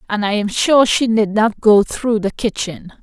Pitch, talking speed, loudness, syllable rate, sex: 215 Hz, 220 wpm, -16 LUFS, 4.4 syllables/s, female